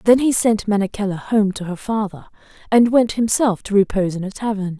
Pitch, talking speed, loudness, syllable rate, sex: 205 Hz, 200 wpm, -18 LUFS, 5.5 syllables/s, female